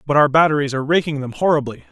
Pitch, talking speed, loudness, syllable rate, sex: 145 Hz, 220 wpm, -17 LUFS, 7.5 syllables/s, male